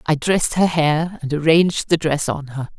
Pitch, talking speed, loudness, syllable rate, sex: 155 Hz, 215 wpm, -18 LUFS, 5.0 syllables/s, female